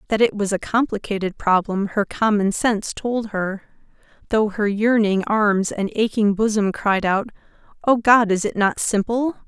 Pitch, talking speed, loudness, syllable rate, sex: 210 Hz, 165 wpm, -20 LUFS, 4.6 syllables/s, female